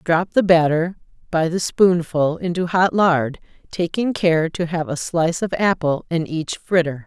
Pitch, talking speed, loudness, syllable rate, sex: 170 Hz, 170 wpm, -19 LUFS, 4.3 syllables/s, female